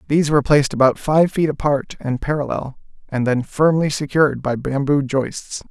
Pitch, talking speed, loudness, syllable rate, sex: 145 Hz, 170 wpm, -19 LUFS, 5.2 syllables/s, male